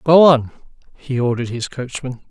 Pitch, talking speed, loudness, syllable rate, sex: 130 Hz, 155 wpm, -17 LUFS, 5.2 syllables/s, male